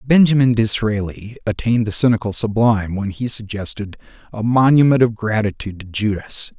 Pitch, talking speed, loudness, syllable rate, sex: 110 Hz, 135 wpm, -18 LUFS, 5.5 syllables/s, male